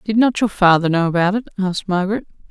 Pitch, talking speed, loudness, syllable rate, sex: 195 Hz, 215 wpm, -17 LUFS, 6.7 syllables/s, female